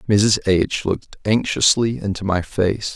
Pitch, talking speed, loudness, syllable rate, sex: 100 Hz, 140 wpm, -19 LUFS, 4.3 syllables/s, male